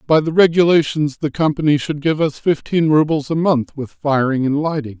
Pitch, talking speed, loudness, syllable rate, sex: 150 Hz, 190 wpm, -17 LUFS, 5.2 syllables/s, male